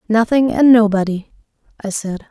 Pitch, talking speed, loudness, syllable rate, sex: 215 Hz, 130 wpm, -15 LUFS, 4.7 syllables/s, female